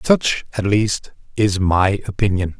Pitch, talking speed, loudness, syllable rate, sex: 100 Hz, 140 wpm, -18 LUFS, 3.9 syllables/s, male